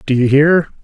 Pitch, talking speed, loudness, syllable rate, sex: 145 Hz, 215 wpm, -12 LUFS, 5.0 syllables/s, male